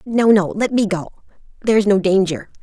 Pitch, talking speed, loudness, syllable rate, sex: 200 Hz, 185 wpm, -17 LUFS, 5.4 syllables/s, female